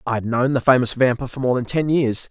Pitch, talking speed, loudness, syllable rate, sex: 125 Hz, 285 wpm, -19 LUFS, 5.9 syllables/s, male